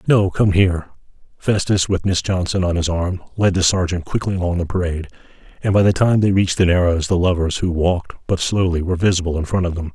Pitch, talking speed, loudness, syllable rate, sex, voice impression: 90 Hz, 215 wpm, -18 LUFS, 6.2 syllables/s, male, masculine, middle-aged, very thick, tensed, slightly powerful, slightly hard, muffled, raspy, cool, intellectual, calm, mature, unique, wild, slightly lively, slightly strict